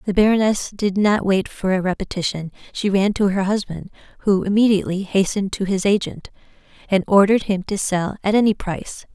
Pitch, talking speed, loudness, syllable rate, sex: 195 Hz, 175 wpm, -19 LUFS, 5.7 syllables/s, female